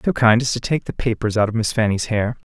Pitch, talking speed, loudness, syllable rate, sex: 115 Hz, 310 wpm, -19 LUFS, 6.3 syllables/s, male